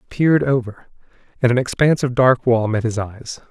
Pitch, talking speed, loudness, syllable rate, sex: 125 Hz, 205 wpm, -18 LUFS, 6.0 syllables/s, male